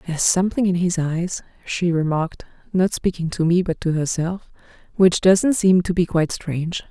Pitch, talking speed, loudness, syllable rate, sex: 175 Hz, 185 wpm, -20 LUFS, 5.2 syllables/s, female